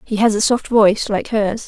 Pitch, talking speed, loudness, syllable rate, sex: 215 Hz, 250 wpm, -16 LUFS, 5.1 syllables/s, female